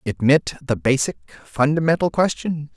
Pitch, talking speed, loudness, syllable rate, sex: 140 Hz, 130 wpm, -20 LUFS, 4.8 syllables/s, male